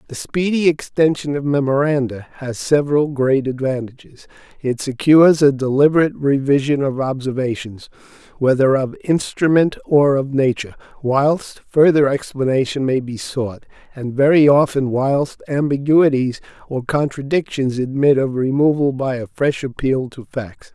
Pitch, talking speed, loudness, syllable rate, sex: 135 Hz, 125 wpm, -17 LUFS, 4.7 syllables/s, male